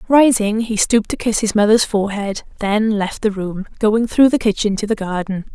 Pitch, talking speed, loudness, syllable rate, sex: 210 Hz, 205 wpm, -17 LUFS, 5.2 syllables/s, female